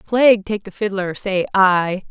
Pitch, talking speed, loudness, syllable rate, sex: 200 Hz, 170 wpm, -17 LUFS, 4.3 syllables/s, female